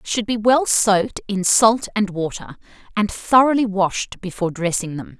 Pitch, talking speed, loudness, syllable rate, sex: 205 Hz, 160 wpm, -19 LUFS, 4.6 syllables/s, female